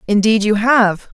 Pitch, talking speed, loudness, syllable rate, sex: 215 Hz, 150 wpm, -14 LUFS, 4.2 syllables/s, female